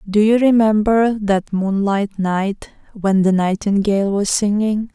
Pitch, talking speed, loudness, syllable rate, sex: 205 Hz, 135 wpm, -17 LUFS, 4.0 syllables/s, female